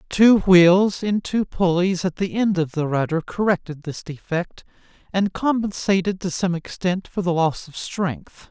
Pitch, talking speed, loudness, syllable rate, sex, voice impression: 185 Hz, 170 wpm, -21 LUFS, 4.2 syllables/s, male, very masculine, slightly feminine, gender-neutral, adult-like, middle-aged, slightly thick, tensed, slightly powerful, slightly bright, soft, clear, fluent, slightly cool, intellectual, refreshing, very sincere, very calm, slightly mature, slightly friendly, reassuring, very unique, slightly elegant, wild, slightly sweet, lively, kind, slightly intense, slightly modest